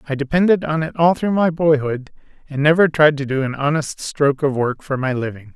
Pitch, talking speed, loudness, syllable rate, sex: 145 Hz, 225 wpm, -18 LUFS, 5.6 syllables/s, male